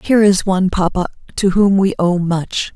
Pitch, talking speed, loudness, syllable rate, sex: 190 Hz, 195 wpm, -15 LUFS, 5.2 syllables/s, female